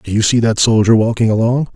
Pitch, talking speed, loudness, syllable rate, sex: 115 Hz, 240 wpm, -13 LUFS, 6.0 syllables/s, male